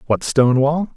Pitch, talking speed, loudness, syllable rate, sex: 140 Hz, 190 wpm, -16 LUFS, 5.1 syllables/s, male